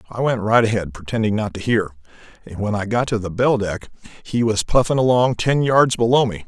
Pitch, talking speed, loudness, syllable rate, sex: 110 Hz, 225 wpm, -19 LUFS, 5.6 syllables/s, male